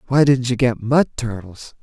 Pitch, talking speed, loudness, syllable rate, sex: 125 Hz, 195 wpm, -18 LUFS, 4.6 syllables/s, male